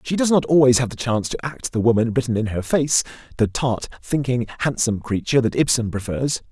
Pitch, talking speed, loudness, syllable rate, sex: 125 Hz, 210 wpm, -20 LUFS, 6.1 syllables/s, male